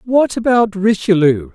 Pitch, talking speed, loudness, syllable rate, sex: 195 Hz, 115 wpm, -14 LUFS, 4.1 syllables/s, male